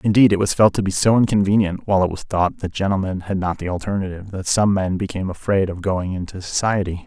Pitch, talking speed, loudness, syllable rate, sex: 95 Hz, 230 wpm, -20 LUFS, 6.3 syllables/s, male